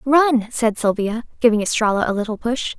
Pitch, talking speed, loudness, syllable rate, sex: 230 Hz, 170 wpm, -19 LUFS, 5.2 syllables/s, female